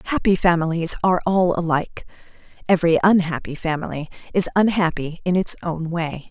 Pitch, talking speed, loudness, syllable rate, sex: 170 Hz, 135 wpm, -20 LUFS, 5.7 syllables/s, female